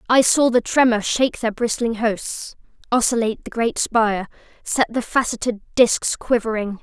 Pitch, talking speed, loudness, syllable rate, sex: 230 Hz, 150 wpm, -20 LUFS, 4.9 syllables/s, female